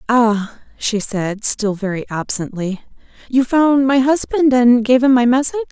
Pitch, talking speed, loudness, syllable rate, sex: 240 Hz, 155 wpm, -16 LUFS, 4.4 syllables/s, female